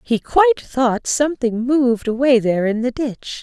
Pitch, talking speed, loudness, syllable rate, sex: 250 Hz, 175 wpm, -17 LUFS, 4.8 syllables/s, female